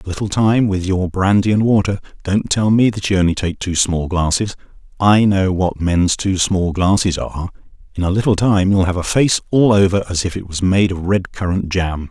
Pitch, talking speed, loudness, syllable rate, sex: 95 Hz, 225 wpm, -16 LUFS, 5.2 syllables/s, male